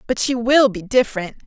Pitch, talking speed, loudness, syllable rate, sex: 230 Hz, 205 wpm, -17 LUFS, 5.8 syllables/s, female